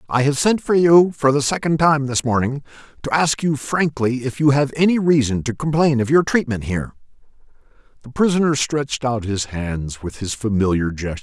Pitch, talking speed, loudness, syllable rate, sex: 130 Hz, 190 wpm, -18 LUFS, 5.3 syllables/s, male